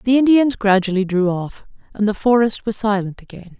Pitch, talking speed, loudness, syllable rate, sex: 210 Hz, 185 wpm, -17 LUFS, 5.2 syllables/s, female